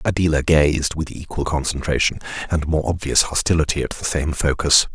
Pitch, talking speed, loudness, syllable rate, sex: 75 Hz, 160 wpm, -20 LUFS, 5.3 syllables/s, male